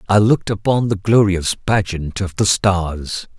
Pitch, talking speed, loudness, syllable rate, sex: 100 Hz, 160 wpm, -17 LUFS, 4.2 syllables/s, male